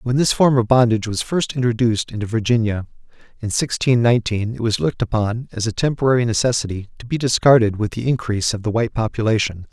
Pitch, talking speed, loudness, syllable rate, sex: 115 Hz, 190 wpm, -19 LUFS, 6.5 syllables/s, male